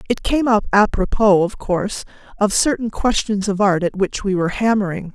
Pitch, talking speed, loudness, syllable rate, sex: 205 Hz, 185 wpm, -18 LUFS, 5.3 syllables/s, female